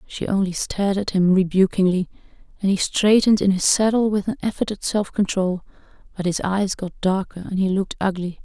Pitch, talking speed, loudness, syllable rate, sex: 195 Hz, 185 wpm, -21 LUFS, 5.6 syllables/s, female